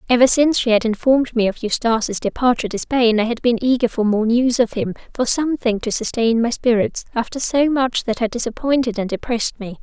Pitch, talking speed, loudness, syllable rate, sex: 235 Hz, 215 wpm, -18 LUFS, 5.9 syllables/s, female